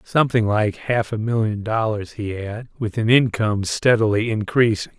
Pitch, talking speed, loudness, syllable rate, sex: 110 Hz, 155 wpm, -20 LUFS, 4.8 syllables/s, male